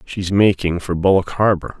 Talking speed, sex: 165 wpm, male